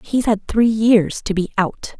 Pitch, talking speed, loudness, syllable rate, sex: 210 Hz, 210 wpm, -17 LUFS, 3.9 syllables/s, female